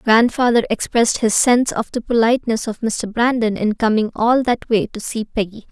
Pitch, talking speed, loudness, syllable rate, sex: 225 Hz, 190 wpm, -17 LUFS, 5.3 syllables/s, female